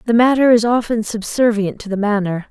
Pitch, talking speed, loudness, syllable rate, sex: 220 Hz, 190 wpm, -16 LUFS, 5.6 syllables/s, female